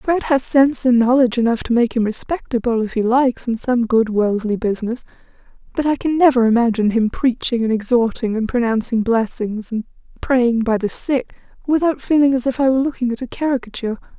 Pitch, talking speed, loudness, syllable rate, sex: 240 Hz, 190 wpm, -18 LUFS, 5.9 syllables/s, female